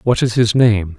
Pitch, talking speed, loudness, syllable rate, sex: 110 Hz, 245 wpm, -14 LUFS, 4.5 syllables/s, male